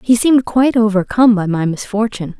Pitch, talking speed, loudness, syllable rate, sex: 220 Hz, 175 wpm, -14 LUFS, 6.6 syllables/s, female